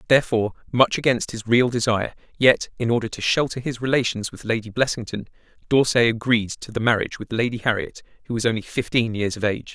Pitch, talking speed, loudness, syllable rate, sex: 115 Hz, 190 wpm, -22 LUFS, 6.3 syllables/s, male